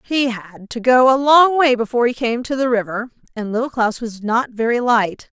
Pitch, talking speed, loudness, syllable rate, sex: 240 Hz, 220 wpm, -17 LUFS, 5.1 syllables/s, female